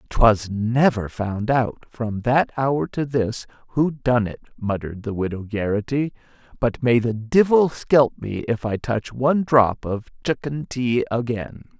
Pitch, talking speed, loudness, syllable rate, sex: 120 Hz, 160 wpm, -22 LUFS, 4.0 syllables/s, male